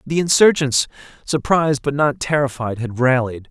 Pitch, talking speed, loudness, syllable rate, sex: 140 Hz, 135 wpm, -18 LUFS, 5.0 syllables/s, male